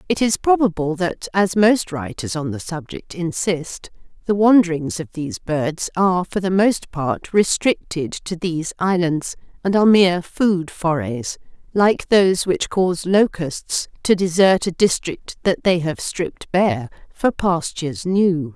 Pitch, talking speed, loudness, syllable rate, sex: 175 Hz, 150 wpm, -19 LUFS, 4.2 syllables/s, female